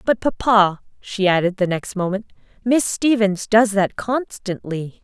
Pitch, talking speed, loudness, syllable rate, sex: 205 Hz, 145 wpm, -19 LUFS, 4.1 syllables/s, female